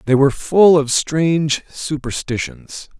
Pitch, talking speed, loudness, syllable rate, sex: 145 Hz, 120 wpm, -16 LUFS, 4.1 syllables/s, male